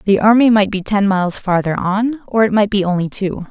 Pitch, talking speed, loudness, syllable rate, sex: 200 Hz, 240 wpm, -15 LUFS, 5.5 syllables/s, female